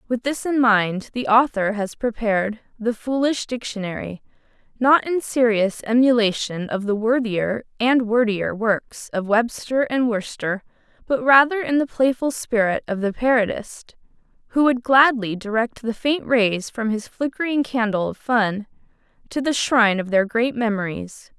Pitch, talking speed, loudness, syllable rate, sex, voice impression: 230 Hz, 145 wpm, -20 LUFS, 4.5 syllables/s, female, feminine, adult-like, tensed, slightly bright, clear, slightly raspy, calm, friendly, reassuring, kind, slightly modest